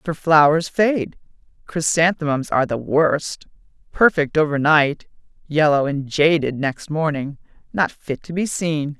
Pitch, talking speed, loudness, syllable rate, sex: 155 Hz, 125 wpm, -19 LUFS, 4.1 syllables/s, female